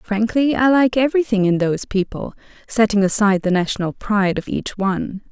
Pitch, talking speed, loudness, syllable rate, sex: 210 Hz, 170 wpm, -18 LUFS, 5.7 syllables/s, female